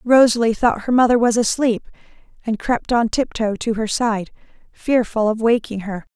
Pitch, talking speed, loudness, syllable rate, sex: 225 Hz, 165 wpm, -18 LUFS, 4.9 syllables/s, female